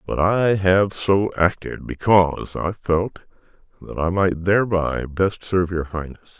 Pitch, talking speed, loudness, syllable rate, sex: 90 Hz, 150 wpm, -20 LUFS, 4.1 syllables/s, male